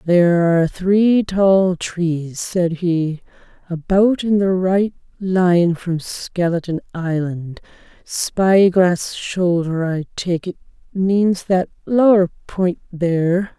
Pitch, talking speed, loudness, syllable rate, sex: 180 Hz, 115 wpm, -18 LUFS, 3.2 syllables/s, female